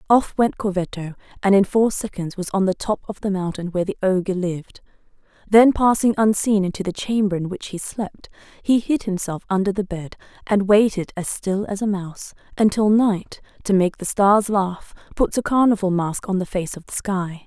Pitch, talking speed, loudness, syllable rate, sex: 195 Hz, 200 wpm, -20 LUFS, 5.1 syllables/s, female